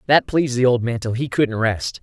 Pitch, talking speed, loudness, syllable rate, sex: 125 Hz, 265 wpm, -19 LUFS, 5.4 syllables/s, male